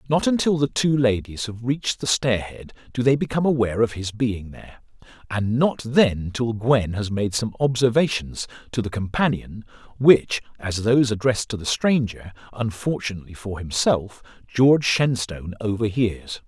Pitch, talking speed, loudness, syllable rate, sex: 115 Hz, 155 wpm, -22 LUFS, 5.0 syllables/s, male